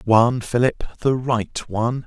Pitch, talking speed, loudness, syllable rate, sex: 120 Hz, 145 wpm, -21 LUFS, 4.5 syllables/s, male